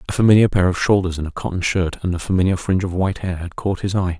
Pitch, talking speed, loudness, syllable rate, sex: 90 Hz, 285 wpm, -19 LUFS, 7.0 syllables/s, male